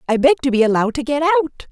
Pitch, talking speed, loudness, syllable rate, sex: 240 Hz, 280 wpm, -17 LUFS, 8.2 syllables/s, female